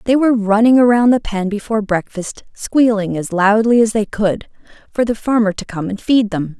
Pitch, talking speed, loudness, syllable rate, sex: 215 Hz, 200 wpm, -15 LUFS, 5.2 syllables/s, female